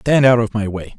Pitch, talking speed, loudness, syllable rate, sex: 115 Hz, 305 wpm, -16 LUFS, 5.4 syllables/s, male